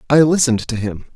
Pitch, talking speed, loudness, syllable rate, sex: 125 Hz, 205 wpm, -16 LUFS, 6.7 syllables/s, male